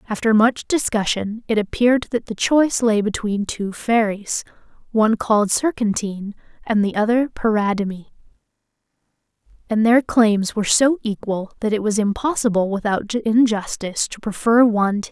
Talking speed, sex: 145 wpm, female